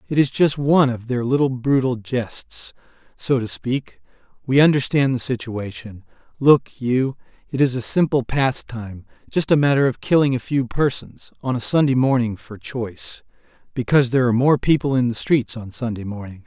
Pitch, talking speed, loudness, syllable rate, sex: 125 Hz, 175 wpm, -20 LUFS, 5.1 syllables/s, male